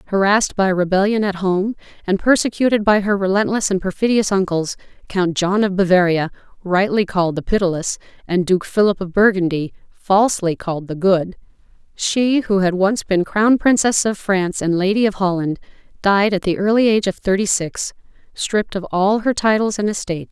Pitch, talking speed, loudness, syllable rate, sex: 195 Hz, 170 wpm, -18 LUFS, 5.4 syllables/s, female